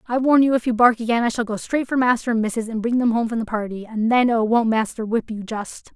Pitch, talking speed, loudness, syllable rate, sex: 230 Hz, 300 wpm, -20 LUFS, 6.1 syllables/s, female